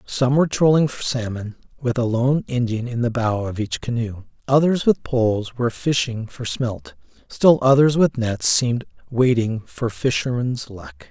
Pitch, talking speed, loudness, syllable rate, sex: 120 Hz, 165 wpm, -20 LUFS, 4.5 syllables/s, male